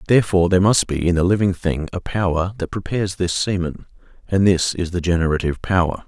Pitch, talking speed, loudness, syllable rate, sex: 90 Hz, 195 wpm, -19 LUFS, 6.3 syllables/s, male